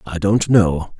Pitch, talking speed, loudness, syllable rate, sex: 95 Hz, 180 wpm, -16 LUFS, 3.6 syllables/s, male